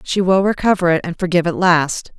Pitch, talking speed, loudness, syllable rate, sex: 175 Hz, 220 wpm, -16 LUFS, 6.0 syllables/s, female